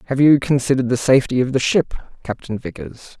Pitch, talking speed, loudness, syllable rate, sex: 130 Hz, 190 wpm, -17 LUFS, 6.2 syllables/s, male